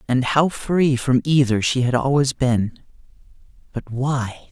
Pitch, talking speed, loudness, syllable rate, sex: 130 Hz, 135 wpm, -19 LUFS, 4.0 syllables/s, male